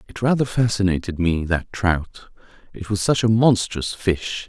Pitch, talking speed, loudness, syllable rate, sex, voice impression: 100 Hz, 160 wpm, -20 LUFS, 4.6 syllables/s, male, masculine, middle-aged, tensed, powerful, slightly bright, slightly hard, clear, intellectual, calm, slightly mature, wild, lively